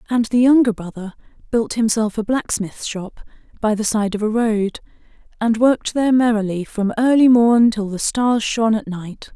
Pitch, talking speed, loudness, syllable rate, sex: 220 Hz, 180 wpm, -18 LUFS, 4.9 syllables/s, female